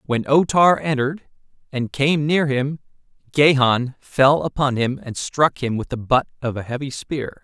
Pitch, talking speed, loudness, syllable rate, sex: 135 Hz, 175 wpm, -19 LUFS, 4.4 syllables/s, male